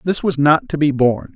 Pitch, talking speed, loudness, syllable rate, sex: 150 Hz, 265 wpm, -16 LUFS, 5.7 syllables/s, male